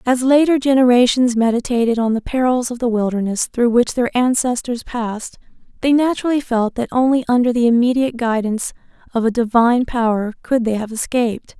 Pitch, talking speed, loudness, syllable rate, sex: 240 Hz, 165 wpm, -17 LUFS, 5.7 syllables/s, female